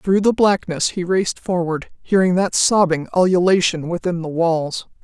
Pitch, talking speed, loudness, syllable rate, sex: 180 Hz, 155 wpm, -18 LUFS, 4.7 syllables/s, female